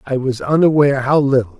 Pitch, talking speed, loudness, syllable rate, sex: 135 Hz, 190 wpm, -15 LUFS, 6.1 syllables/s, male